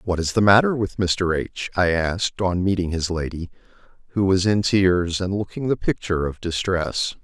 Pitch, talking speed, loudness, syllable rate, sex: 95 Hz, 190 wpm, -21 LUFS, 4.9 syllables/s, male